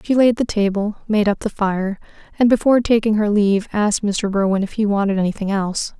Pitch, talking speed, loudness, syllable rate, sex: 210 Hz, 210 wpm, -18 LUFS, 6.0 syllables/s, female